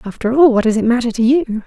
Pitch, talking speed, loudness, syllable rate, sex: 240 Hz, 290 wpm, -14 LUFS, 6.5 syllables/s, female